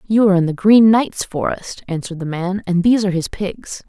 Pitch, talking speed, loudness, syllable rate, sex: 190 Hz, 230 wpm, -17 LUFS, 5.7 syllables/s, female